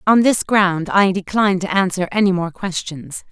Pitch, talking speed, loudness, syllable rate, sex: 190 Hz, 180 wpm, -17 LUFS, 4.8 syllables/s, female